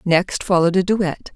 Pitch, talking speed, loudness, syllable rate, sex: 180 Hz, 175 wpm, -18 LUFS, 4.9 syllables/s, female